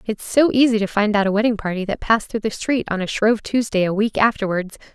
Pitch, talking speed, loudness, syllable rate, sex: 215 Hz, 255 wpm, -19 LUFS, 6.2 syllables/s, female